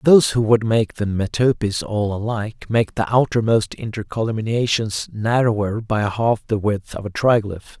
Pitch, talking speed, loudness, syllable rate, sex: 110 Hz, 155 wpm, -20 LUFS, 4.7 syllables/s, male